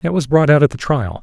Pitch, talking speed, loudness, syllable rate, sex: 140 Hz, 340 wpm, -14 LUFS, 5.9 syllables/s, male